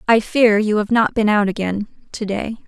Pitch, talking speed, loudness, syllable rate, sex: 215 Hz, 225 wpm, -17 LUFS, 5.0 syllables/s, female